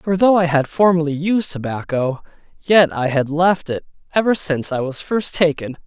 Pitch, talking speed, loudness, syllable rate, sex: 160 Hz, 185 wpm, -18 LUFS, 4.9 syllables/s, male